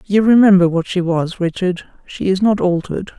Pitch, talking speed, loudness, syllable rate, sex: 185 Hz, 190 wpm, -15 LUFS, 5.3 syllables/s, female